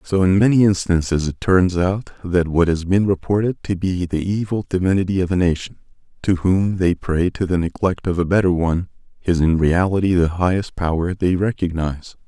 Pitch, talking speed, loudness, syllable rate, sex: 90 Hz, 190 wpm, -19 LUFS, 5.3 syllables/s, male